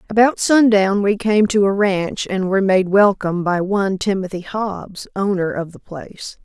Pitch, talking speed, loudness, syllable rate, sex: 195 Hz, 175 wpm, -17 LUFS, 4.7 syllables/s, female